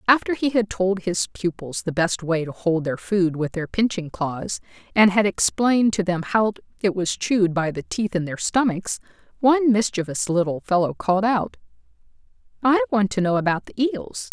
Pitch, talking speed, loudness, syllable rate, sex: 180 Hz, 190 wpm, -22 LUFS, 5.0 syllables/s, female